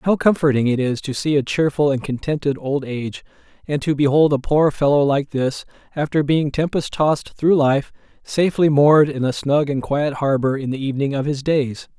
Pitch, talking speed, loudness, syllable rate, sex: 145 Hz, 200 wpm, -19 LUFS, 5.2 syllables/s, male